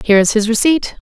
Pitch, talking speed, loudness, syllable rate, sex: 230 Hz, 225 wpm, -14 LUFS, 6.5 syllables/s, female